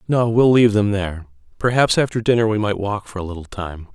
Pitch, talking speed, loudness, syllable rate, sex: 105 Hz, 230 wpm, -18 LUFS, 6.1 syllables/s, male